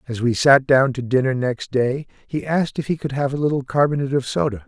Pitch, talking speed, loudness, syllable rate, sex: 135 Hz, 245 wpm, -20 LUFS, 6.0 syllables/s, male